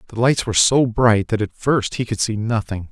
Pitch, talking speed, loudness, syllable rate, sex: 110 Hz, 245 wpm, -18 LUFS, 5.2 syllables/s, male